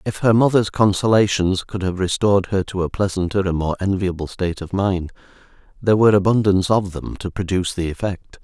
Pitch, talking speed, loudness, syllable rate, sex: 95 Hz, 185 wpm, -19 LUFS, 6.0 syllables/s, male